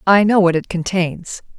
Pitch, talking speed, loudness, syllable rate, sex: 180 Hz, 190 wpm, -16 LUFS, 4.5 syllables/s, female